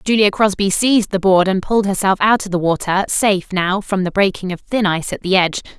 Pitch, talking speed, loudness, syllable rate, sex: 195 Hz, 240 wpm, -16 LUFS, 6.1 syllables/s, female